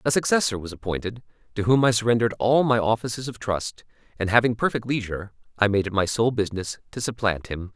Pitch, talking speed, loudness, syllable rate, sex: 110 Hz, 200 wpm, -23 LUFS, 6.3 syllables/s, male